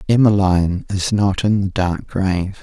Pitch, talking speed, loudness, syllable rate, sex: 95 Hz, 160 wpm, -17 LUFS, 4.6 syllables/s, male